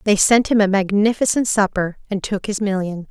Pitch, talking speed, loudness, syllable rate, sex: 200 Hz, 195 wpm, -18 LUFS, 5.2 syllables/s, female